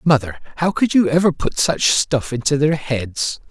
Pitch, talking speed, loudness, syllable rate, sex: 145 Hz, 190 wpm, -18 LUFS, 4.6 syllables/s, male